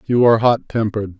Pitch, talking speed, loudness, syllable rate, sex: 110 Hz, 200 wpm, -16 LUFS, 6.5 syllables/s, male